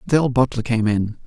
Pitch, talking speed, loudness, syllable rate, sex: 120 Hz, 235 wpm, -19 LUFS, 5.5 syllables/s, male